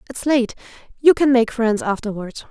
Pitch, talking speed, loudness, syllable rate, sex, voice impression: 240 Hz, 170 wpm, -18 LUFS, 4.8 syllables/s, female, very feminine, young, very thin, tensed, slightly weak, slightly bright, soft, slightly muffled, fluent, slightly raspy, very cute, intellectual, refreshing, sincere, very calm, very friendly, very reassuring, unique, elegant, slightly wild, very sweet, lively, very kind, slightly sharp, modest, very light